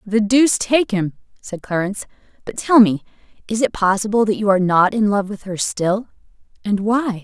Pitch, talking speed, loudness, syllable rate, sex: 210 Hz, 180 wpm, -18 LUFS, 5.3 syllables/s, female